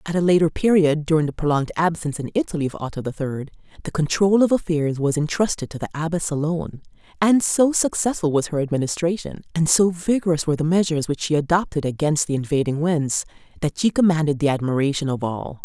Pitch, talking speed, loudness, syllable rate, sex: 160 Hz, 190 wpm, -21 LUFS, 6.2 syllables/s, female